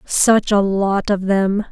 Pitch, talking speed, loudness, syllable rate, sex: 200 Hz, 175 wpm, -16 LUFS, 3.1 syllables/s, female